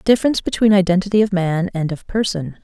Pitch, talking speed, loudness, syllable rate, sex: 190 Hz, 180 wpm, -17 LUFS, 6.4 syllables/s, female